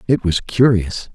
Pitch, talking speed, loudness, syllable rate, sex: 105 Hz, 155 wpm, -17 LUFS, 4.1 syllables/s, male